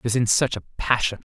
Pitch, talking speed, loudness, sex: 110 Hz, 275 wpm, -22 LUFS, male